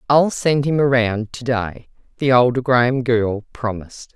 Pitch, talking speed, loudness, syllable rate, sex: 125 Hz, 145 wpm, -18 LUFS, 4.5 syllables/s, female